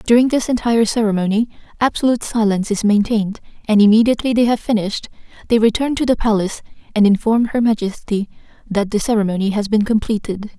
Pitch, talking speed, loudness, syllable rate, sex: 220 Hz, 160 wpm, -17 LUFS, 6.6 syllables/s, female